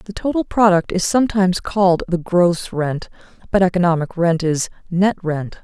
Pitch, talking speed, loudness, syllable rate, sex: 180 Hz, 160 wpm, -18 LUFS, 5.1 syllables/s, female